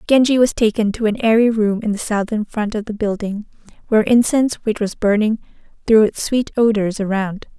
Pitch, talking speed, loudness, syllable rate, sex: 215 Hz, 190 wpm, -17 LUFS, 5.5 syllables/s, female